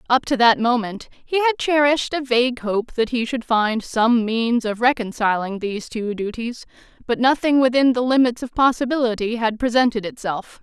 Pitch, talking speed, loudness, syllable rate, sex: 240 Hz, 175 wpm, -20 LUFS, 5.0 syllables/s, female